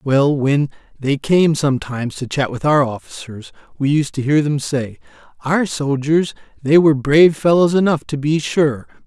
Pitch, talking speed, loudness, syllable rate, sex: 145 Hz, 170 wpm, -17 LUFS, 4.8 syllables/s, male